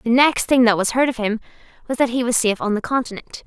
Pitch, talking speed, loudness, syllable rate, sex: 240 Hz, 275 wpm, -19 LUFS, 6.4 syllables/s, female